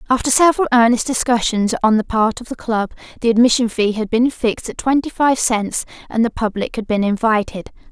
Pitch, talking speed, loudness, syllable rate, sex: 230 Hz, 195 wpm, -17 LUFS, 5.6 syllables/s, female